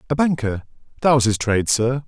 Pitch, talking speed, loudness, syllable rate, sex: 125 Hz, 175 wpm, -19 LUFS, 6.1 syllables/s, male